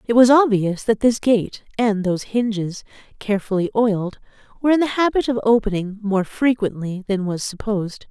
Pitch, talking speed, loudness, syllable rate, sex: 215 Hz, 165 wpm, -20 LUFS, 5.4 syllables/s, female